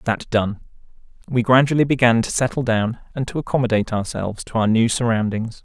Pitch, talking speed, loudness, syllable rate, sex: 120 Hz, 170 wpm, -20 LUFS, 6.0 syllables/s, male